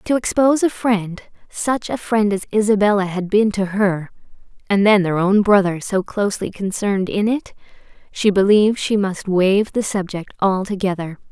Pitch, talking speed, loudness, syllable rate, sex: 200 Hz, 160 wpm, -18 LUFS, 5.0 syllables/s, female